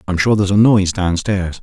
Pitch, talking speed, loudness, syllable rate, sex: 95 Hz, 220 wpm, -15 LUFS, 6.0 syllables/s, male